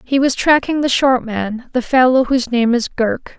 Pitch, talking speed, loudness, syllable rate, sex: 250 Hz, 215 wpm, -15 LUFS, 4.9 syllables/s, female